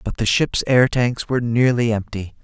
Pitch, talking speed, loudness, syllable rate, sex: 120 Hz, 195 wpm, -18 LUFS, 4.9 syllables/s, male